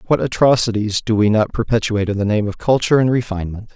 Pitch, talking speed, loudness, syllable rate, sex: 110 Hz, 210 wpm, -17 LUFS, 6.8 syllables/s, male